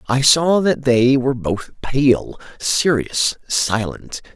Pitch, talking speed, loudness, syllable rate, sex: 130 Hz, 125 wpm, -17 LUFS, 3.2 syllables/s, male